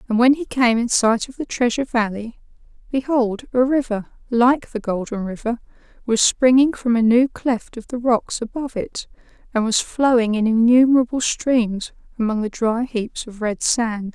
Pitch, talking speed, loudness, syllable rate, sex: 235 Hz, 175 wpm, -19 LUFS, 4.7 syllables/s, female